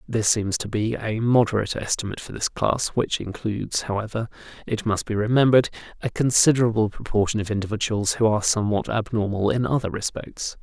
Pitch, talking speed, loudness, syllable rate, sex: 110 Hz, 165 wpm, -23 LUFS, 6.0 syllables/s, male